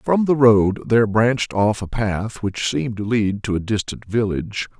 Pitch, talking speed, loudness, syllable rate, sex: 110 Hz, 200 wpm, -19 LUFS, 4.8 syllables/s, male